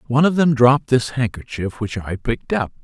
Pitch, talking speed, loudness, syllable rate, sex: 120 Hz, 210 wpm, -19 LUFS, 5.8 syllables/s, male